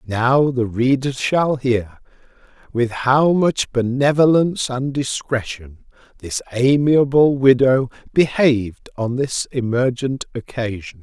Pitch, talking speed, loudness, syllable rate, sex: 130 Hz, 105 wpm, -18 LUFS, 3.6 syllables/s, male